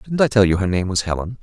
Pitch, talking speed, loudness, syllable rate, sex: 105 Hz, 340 wpm, -18 LUFS, 7.1 syllables/s, male